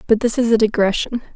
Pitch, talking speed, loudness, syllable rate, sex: 220 Hz, 220 wpm, -17 LUFS, 6.5 syllables/s, female